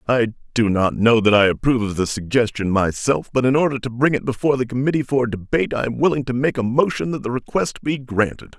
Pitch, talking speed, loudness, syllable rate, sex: 120 Hz, 240 wpm, -19 LUFS, 6.1 syllables/s, male